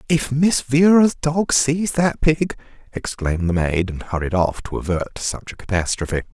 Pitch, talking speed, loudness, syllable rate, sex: 125 Hz, 170 wpm, -20 LUFS, 4.6 syllables/s, male